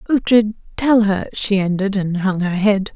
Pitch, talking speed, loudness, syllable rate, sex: 200 Hz, 160 wpm, -17 LUFS, 4.5 syllables/s, female